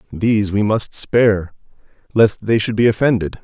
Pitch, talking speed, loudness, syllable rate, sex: 105 Hz, 155 wpm, -16 LUFS, 5.0 syllables/s, male